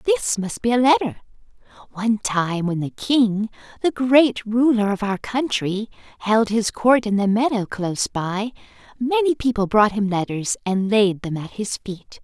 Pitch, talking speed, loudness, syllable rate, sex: 220 Hz, 170 wpm, -20 LUFS, 4.4 syllables/s, female